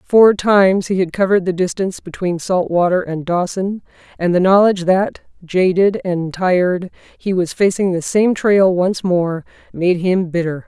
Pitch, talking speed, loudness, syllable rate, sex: 185 Hz, 170 wpm, -16 LUFS, 4.6 syllables/s, female